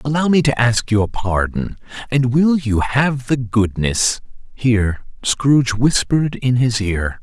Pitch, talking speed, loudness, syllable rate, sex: 120 Hz, 140 wpm, -17 LUFS, 4.0 syllables/s, male